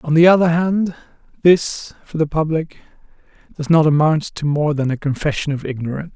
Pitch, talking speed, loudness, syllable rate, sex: 155 Hz, 175 wpm, -17 LUFS, 5.6 syllables/s, male